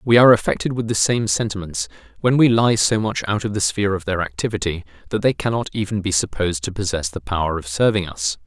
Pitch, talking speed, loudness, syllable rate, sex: 100 Hz, 225 wpm, -20 LUFS, 6.2 syllables/s, male